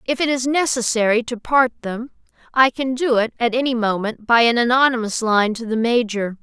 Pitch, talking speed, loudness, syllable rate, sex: 240 Hz, 195 wpm, -18 LUFS, 5.1 syllables/s, female